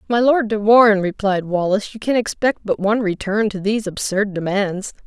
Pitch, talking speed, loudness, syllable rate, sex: 205 Hz, 190 wpm, -18 LUFS, 5.7 syllables/s, female